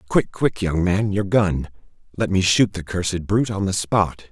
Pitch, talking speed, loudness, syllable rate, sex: 95 Hz, 195 wpm, -21 LUFS, 4.6 syllables/s, male